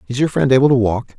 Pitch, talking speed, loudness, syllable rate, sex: 125 Hz, 305 wpm, -15 LUFS, 6.8 syllables/s, male